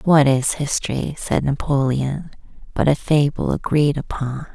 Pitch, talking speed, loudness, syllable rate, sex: 140 Hz, 130 wpm, -20 LUFS, 4.3 syllables/s, female